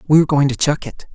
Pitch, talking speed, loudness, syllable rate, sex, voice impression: 145 Hz, 260 wpm, -16 LUFS, 6.0 syllables/s, male, masculine, adult-like, tensed, powerful, slightly bright, clear, fluent, intellectual, friendly, unique, lively, slightly kind, slightly sharp, slightly light